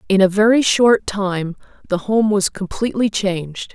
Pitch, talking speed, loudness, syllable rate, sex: 200 Hz, 160 wpm, -17 LUFS, 4.6 syllables/s, female